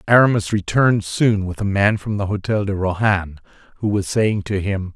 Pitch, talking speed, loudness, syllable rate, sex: 100 Hz, 195 wpm, -19 LUFS, 5.0 syllables/s, male